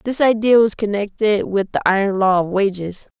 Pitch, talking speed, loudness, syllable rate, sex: 205 Hz, 190 wpm, -17 LUFS, 5.1 syllables/s, female